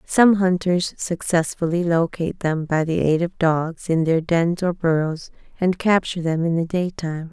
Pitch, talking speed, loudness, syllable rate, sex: 170 Hz, 170 wpm, -21 LUFS, 4.5 syllables/s, female